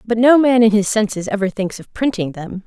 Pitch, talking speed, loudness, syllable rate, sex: 215 Hz, 250 wpm, -16 LUFS, 5.5 syllables/s, female